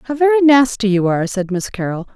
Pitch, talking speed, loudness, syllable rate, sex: 225 Hz, 225 wpm, -15 LUFS, 6.3 syllables/s, female